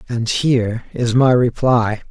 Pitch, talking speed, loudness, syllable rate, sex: 120 Hz, 145 wpm, -16 LUFS, 3.9 syllables/s, male